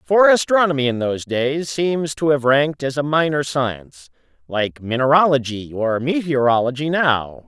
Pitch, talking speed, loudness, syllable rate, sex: 140 Hz, 145 wpm, -18 LUFS, 4.7 syllables/s, male